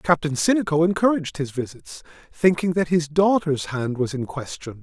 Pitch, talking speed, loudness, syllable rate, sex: 160 Hz, 160 wpm, -22 LUFS, 5.1 syllables/s, male